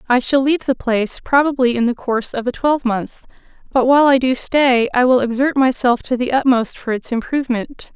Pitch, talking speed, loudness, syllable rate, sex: 255 Hz, 210 wpm, -16 LUFS, 5.7 syllables/s, female